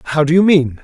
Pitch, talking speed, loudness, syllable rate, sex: 155 Hz, 290 wpm, -12 LUFS, 7.4 syllables/s, male